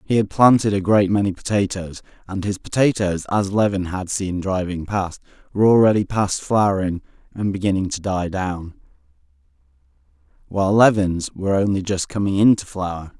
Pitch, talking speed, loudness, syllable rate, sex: 95 Hz, 150 wpm, -20 LUFS, 5.3 syllables/s, male